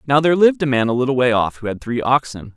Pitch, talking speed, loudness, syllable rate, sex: 130 Hz, 305 wpm, -17 LUFS, 6.9 syllables/s, male